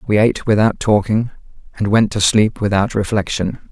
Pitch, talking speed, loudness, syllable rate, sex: 105 Hz, 160 wpm, -16 LUFS, 5.1 syllables/s, male